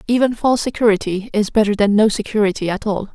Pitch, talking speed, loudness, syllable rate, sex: 210 Hz, 190 wpm, -17 LUFS, 6.5 syllables/s, female